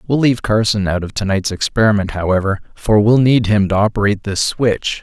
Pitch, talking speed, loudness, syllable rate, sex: 105 Hz, 205 wpm, -15 LUFS, 5.7 syllables/s, male